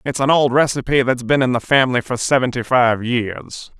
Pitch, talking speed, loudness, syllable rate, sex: 125 Hz, 205 wpm, -17 LUFS, 5.2 syllables/s, male